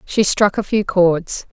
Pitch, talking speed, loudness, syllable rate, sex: 190 Hz, 190 wpm, -17 LUFS, 3.6 syllables/s, female